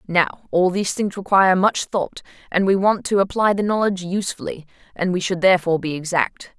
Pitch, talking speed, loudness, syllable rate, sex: 185 Hz, 190 wpm, -20 LUFS, 6.0 syllables/s, female